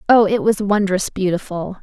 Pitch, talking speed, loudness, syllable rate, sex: 195 Hz, 165 wpm, -18 LUFS, 4.9 syllables/s, female